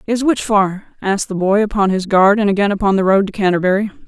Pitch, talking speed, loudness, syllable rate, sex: 200 Hz, 235 wpm, -15 LUFS, 6.2 syllables/s, female